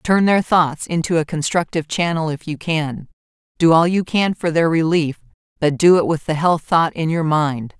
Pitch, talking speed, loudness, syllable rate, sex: 160 Hz, 210 wpm, -18 LUFS, 4.9 syllables/s, female